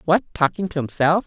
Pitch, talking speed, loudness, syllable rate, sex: 165 Hz, 190 wpm, -21 LUFS, 5.7 syllables/s, female